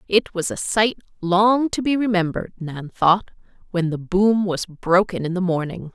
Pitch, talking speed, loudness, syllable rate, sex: 190 Hz, 180 wpm, -21 LUFS, 4.6 syllables/s, female